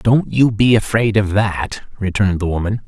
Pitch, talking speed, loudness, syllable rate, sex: 105 Hz, 190 wpm, -16 LUFS, 4.9 syllables/s, male